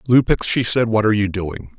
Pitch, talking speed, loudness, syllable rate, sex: 105 Hz, 235 wpm, -18 LUFS, 5.6 syllables/s, male